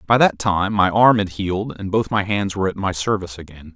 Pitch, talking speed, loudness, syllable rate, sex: 95 Hz, 255 wpm, -19 LUFS, 5.8 syllables/s, male